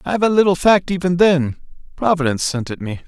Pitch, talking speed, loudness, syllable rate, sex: 165 Hz, 215 wpm, -17 LUFS, 6.3 syllables/s, male